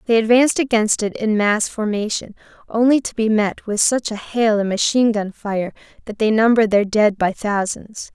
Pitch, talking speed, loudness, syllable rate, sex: 215 Hz, 190 wpm, -18 LUFS, 5.1 syllables/s, female